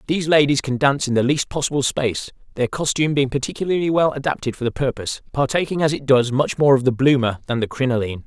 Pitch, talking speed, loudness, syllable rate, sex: 135 Hz, 220 wpm, -19 LUFS, 6.8 syllables/s, male